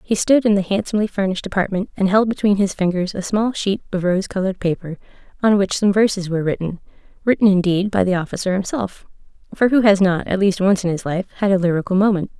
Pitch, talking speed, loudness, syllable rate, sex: 195 Hz, 215 wpm, -18 LUFS, 6.4 syllables/s, female